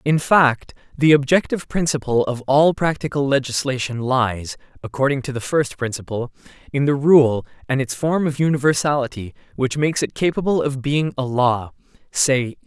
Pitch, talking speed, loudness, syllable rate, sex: 135 Hz, 155 wpm, -19 LUFS, 4.6 syllables/s, male